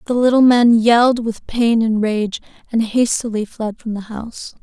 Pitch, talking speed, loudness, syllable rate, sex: 225 Hz, 180 wpm, -16 LUFS, 4.6 syllables/s, female